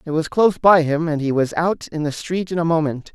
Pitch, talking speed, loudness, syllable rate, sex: 160 Hz, 285 wpm, -19 LUFS, 5.7 syllables/s, male